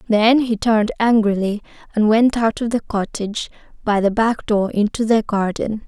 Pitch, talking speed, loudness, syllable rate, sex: 220 Hz, 175 wpm, -18 LUFS, 4.9 syllables/s, female